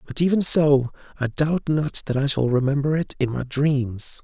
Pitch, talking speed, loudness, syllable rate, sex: 140 Hz, 200 wpm, -21 LUFS, 4.5 syllables/s, male